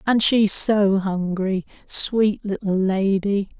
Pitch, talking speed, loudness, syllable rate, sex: 200 Hz, 115 wpm, -20 LUFS, 3.1 syllables/s, female